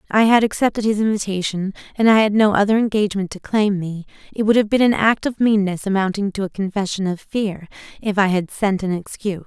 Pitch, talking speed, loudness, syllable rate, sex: 205 Hz, 215 wpm, -19 LUFS, 5.9 syllables/s, female